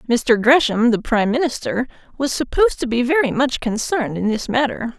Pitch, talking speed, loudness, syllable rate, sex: 245 Hz, 180 wpm, -18 LUFS, 5.6 syllables/s, female